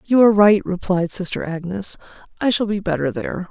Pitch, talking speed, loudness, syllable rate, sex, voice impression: 195 Hz, 190 wpm, -19 LUFS, 5.7 syllables/s, female, feminine, adult-like, slightly sincere, calm, friendly, slightly sweet